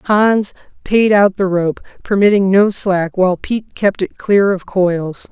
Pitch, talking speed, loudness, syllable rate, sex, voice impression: 195 Hz, 170 wpm, -14 LUFS, 4.0 syllables/s, female, very feminine, very adult-like, thin, tensed, slightly powerful, bright, soft, very clear, fluent, cute, intellectual, slightly refreshing, sincere, slightly calm, slightly friendly, reassuring, very unique, slightly elegant, wild, slightly sweet, slightly strict, intense, slightly sharp